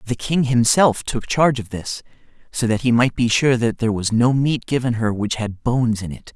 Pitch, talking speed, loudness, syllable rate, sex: 120 Hz, 235 wpm, -19 LUFS, 5.3 syllables/s, male